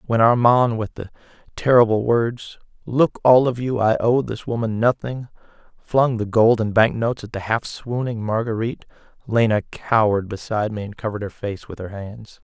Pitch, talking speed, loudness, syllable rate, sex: 110 Hz, 180 wpm, -20 LUFS, 5.1 syllables/s, male